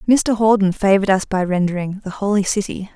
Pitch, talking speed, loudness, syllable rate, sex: 200 Hz, 185 wpm, -18 LUFS, 5.9 syllables/s, female